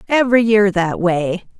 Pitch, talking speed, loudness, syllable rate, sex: 200 Hz, 150 wpm, -15 LUFS, 4.6 syllables/s, female